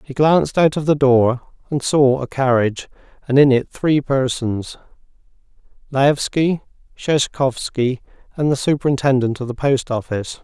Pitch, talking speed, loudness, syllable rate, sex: 135 Hz, 140 wpm, -18 LUFS, 4.7 syllables/s, male